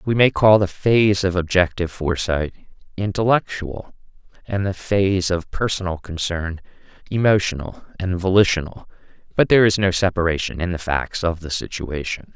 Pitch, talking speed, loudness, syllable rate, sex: 90 Hz, 140 wpm, -20 LUFS, 5.2 syllables/s, male